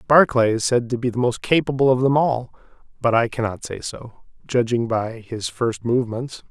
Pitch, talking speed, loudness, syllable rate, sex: 120 Hz, 195 wpm, -21 LUFS, 5.0 syllables/s, male